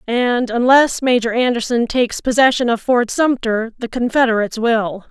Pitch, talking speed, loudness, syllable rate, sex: 240 Hz, 140 wpm, -16 LUFS, 4.9 syllables/s, female